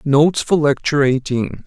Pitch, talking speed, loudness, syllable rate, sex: 140 Hz, 145 wpm, -16 LUFS, 5.1 syllables/s, male